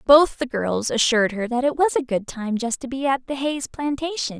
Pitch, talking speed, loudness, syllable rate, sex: 260 Hz, 245 wpm, -22 LUFS, 5.2 syllables/s, female